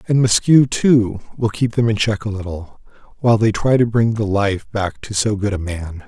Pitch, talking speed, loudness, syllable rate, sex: 105 Hz, 225 wpm, -17 LUFS, 4.8 syllables/s, male